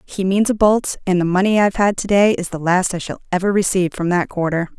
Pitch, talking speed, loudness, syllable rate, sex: 190 Hz, 265 wpm, -17 LUFS, 6.1 syllables/s, female